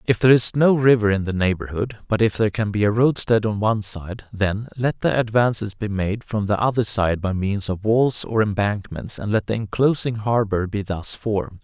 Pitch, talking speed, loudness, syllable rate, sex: 105 Hz, 215 wpm, -21 LUFS, 5.2 syllables/s, male